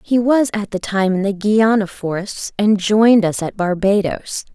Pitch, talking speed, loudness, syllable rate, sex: 205 Hz, 185 wpm, -17 LUFS, 4.4 syllables/s, female